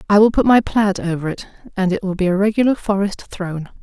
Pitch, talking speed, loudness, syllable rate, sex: 195 Hz, 235 wpm, -18 LUFS, 6.2 syllables/s, female